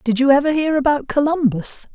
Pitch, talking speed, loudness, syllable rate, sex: 280 Hz, 185 wpm, -17 LUFS, 5.6 syllables/s, female